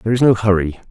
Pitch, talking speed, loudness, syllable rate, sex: 105 Hz, 265 wpm, -15 LUFS, 7.7 syllables/s, male